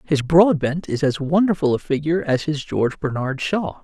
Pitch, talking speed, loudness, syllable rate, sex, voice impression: 155 Hz, 190 wpm, -20 LUFS, 5.1 syllables/s, male, masculine, adult-like, slightly refreshing, slightly unique, slightly kind